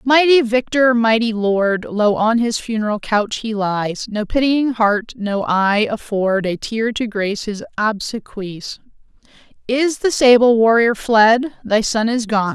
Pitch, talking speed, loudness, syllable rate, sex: 225 Hz, 155 wpm, -17 LUFS, 3.9 syllables/s, female